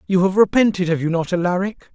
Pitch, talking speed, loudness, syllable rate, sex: 180 Hz, 215 wpm, -18 LUFS, 6.3 syllables/s, male